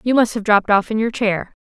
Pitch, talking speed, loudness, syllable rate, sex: 220 Hz, 295 wpm, -17 LUFS, 6.2 syllables/s, female